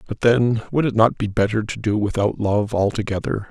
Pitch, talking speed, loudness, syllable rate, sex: 110 Hz, 205 wpm, -20 LUFS, 5.3 syllables/s, male